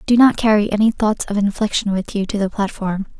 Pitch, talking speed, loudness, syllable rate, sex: 205 Hz, 225 wpm, -18 LUFS, 5.8 syllables/s, female